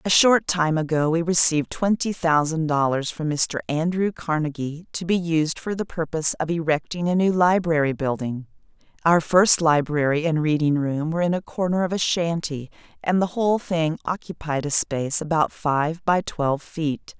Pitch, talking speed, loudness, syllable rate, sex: 160 Hz, 175 wpm, -22 LUFS, 4.9 syllables/s, female